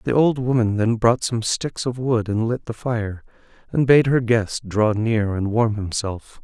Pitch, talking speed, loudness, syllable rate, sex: 115 Hz, 205 wpm, -21 LUFS, 4.1 syllables/s, male